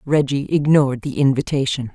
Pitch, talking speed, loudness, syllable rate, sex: 140 Hz, 125 wpm, -18 LUFS, 5.4 syllables/s, female